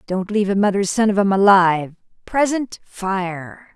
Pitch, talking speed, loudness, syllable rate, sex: 200 Hz, 160 wpm, -18 LUFS, 4.6 syllables/s, female